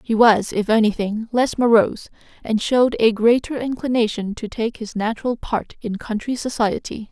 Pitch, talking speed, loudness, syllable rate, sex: 225 Hz, 160 wpm, -20 LUFS, 5.1 syllables/s, female